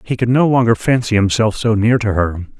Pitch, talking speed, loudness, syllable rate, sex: 110 Hz, 230 wpm, -15 LUFS, 5.6 syllables/s, male